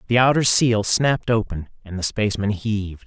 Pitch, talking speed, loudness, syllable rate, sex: 110 Hz, 175 wpm, -20 LUFS, 5.5 syllables/s, male